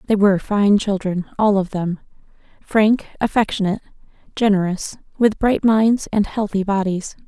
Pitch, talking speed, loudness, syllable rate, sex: 205 Hz, 125 wpm, -19 LUFS, 4.9 syllables/s, female